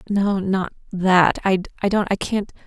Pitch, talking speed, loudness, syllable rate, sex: 195 Hz, 160 wpm, -20 LUFS, 3.6 syllables/s, female